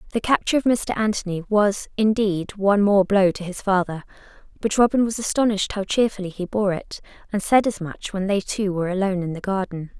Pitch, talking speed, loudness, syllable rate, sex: 200 Hz, 205 wpm, -22 LUFS, 5.9 syllables/s, female